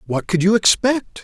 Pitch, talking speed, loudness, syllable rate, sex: 200 Hz, 195 wpm, -16 LUFS, 4.7 syllables/s, male